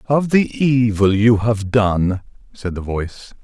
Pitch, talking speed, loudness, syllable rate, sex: 110 Hz, 155 wpm, -17 LUFS, 3.7 syllables/s, male